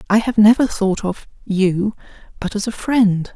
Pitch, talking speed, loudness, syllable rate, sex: 210 Hz, 160 wpm, -17 LUFS, 4.3 syllables/s, female